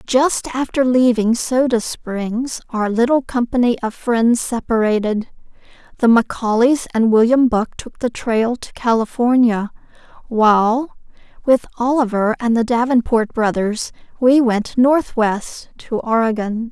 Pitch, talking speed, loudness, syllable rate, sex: 235 Hz, 120 wpm, -17 LUFS, 4.1 syllables/s, female